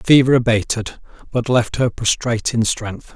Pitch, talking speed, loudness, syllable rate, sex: 120 Hz, 170 wpm, -18 LUFS, 5.2 syllables/s, male